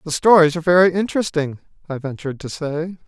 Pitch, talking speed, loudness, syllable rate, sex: 165 Hz, 175 wpm, -18 LUFS, 6.5 syllables/s, male